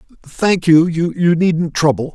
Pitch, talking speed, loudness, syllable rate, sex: 165 Hz, 110 wpm, -15 LUFS, 3.6 syllables/s, male